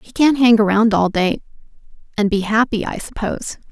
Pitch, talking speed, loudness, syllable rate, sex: 220 Hz, 180 wpm, -17 LUFS, 5.4 syllables/s, female